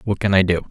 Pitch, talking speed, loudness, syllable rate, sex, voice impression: 95 Hz, 340 wpm, -17 LUFS, 6.7 syllables/s, male, masculine, adult-like, tensed, slightly hard, fluent, slightly raspy, cool, intellectual, calm, wild, slightly lively